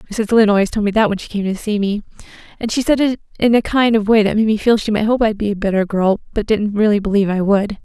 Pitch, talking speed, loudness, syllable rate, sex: 210 Hz, 300 wpm, -16 LUFS, 6.5 syllables/s, female